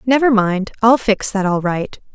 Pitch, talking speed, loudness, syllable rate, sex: 215 Hz, 195 wpm, -16 LUFS, 4.4 syllables/s, female